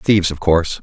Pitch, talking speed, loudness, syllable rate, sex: 85 Hz, 220 wpm, -16 LUFS, 6.3 syllables/s, male